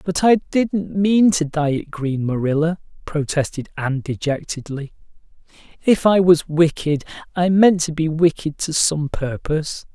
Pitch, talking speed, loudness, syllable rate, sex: 160 Hz, 145 wpm, -19 LUFS, 4.4 syllables/s, male